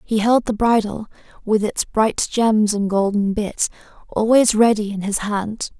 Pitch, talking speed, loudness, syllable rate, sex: 215 Hz, 165 wpm, -19 LUFS, 4.1 syllables/s, female